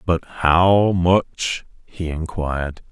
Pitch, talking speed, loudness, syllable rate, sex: 85 Hz, 105 wpm, -19 LUFS, 2.8 syllables/s, male